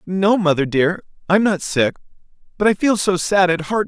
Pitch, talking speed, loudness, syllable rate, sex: 185 Hz, 200 wpm, -17 LUFS, 4.8 syllables/s, male